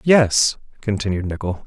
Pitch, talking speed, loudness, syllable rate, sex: 105 Hz, 110 wpm, -20 LUFS, 4.4 syllables/s, male